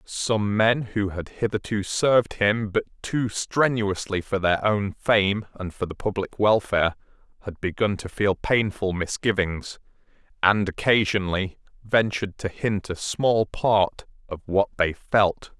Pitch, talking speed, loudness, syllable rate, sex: 100 Hz, 140 wpm, -24 LUFS, 4.1 syllables/s, male